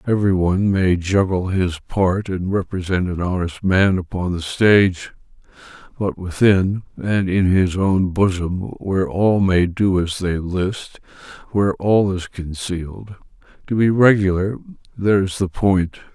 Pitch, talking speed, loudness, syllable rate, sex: 95 Hz, 140 wpm, -19 LUFS, 4.2 syllables/s, male